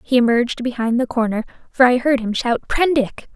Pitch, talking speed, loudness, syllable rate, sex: 245 Hz, 195 wpm, -18 LUFS, 5.6 syllables/s, female